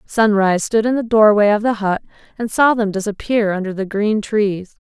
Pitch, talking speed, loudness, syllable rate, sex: 210 Hz, 195 wpm, -16 LUFS, 5.1 syllables/s, female